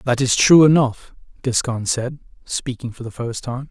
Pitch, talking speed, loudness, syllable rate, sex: 125 Hz, 180 wpm, -18 LUFS, 4.6 syllables/s, male